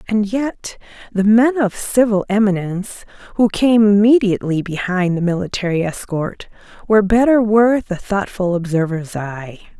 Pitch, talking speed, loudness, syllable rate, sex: 200 Hz, 130 wpm, -16 LUFS, 4.6 syllables/s, female